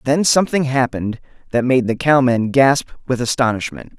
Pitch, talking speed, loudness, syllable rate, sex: 130 Hz, 150 wpm, -17 LUFS, 5.3 syllables/s, male